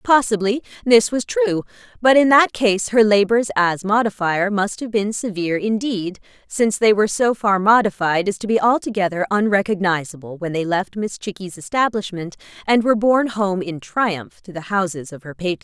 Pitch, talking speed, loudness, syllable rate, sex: 205 Hz, 175 wpm, -18 LUFS, 5.2 syllables/s, female